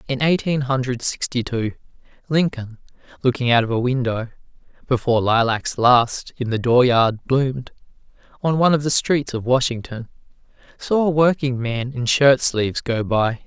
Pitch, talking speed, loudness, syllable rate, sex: 125 Hz, 145 wpm, -19 LUFS, 4.0 syllables/s, male